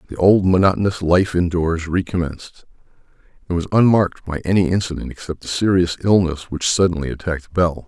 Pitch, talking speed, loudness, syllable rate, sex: 90 Hz, 160 wpm, -18 LUFS, 5.8 syllables/s, male